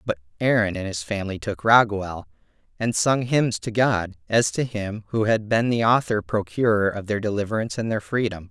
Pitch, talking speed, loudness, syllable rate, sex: 105 Hz, 190 wpm, -23 LUFS, 5.3 syllables/s, male